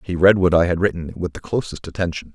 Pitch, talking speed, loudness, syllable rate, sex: 90 Hz, 255 wpm, -19 LUFS, 6.3 syllables/s, male